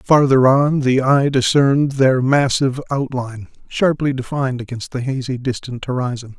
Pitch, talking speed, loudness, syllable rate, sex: 130 Hz, 140 wpm, -17 LUFS, 5.0 syllables/s, male